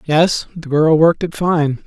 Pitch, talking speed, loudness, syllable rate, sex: 160 Hz, 195 wpm, -15 LUFS, 4.4 syllables/s, male